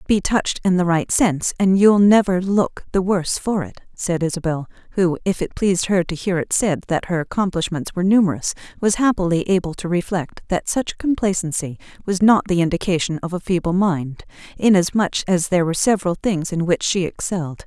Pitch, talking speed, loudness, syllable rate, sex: 180 Hz, 190 wpm, -19 LUFS, 5.6 syllables/s, female